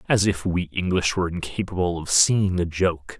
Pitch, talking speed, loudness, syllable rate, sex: 90 Hz, 190 wpm, -22 LUFS, 5.0 syllables/s, male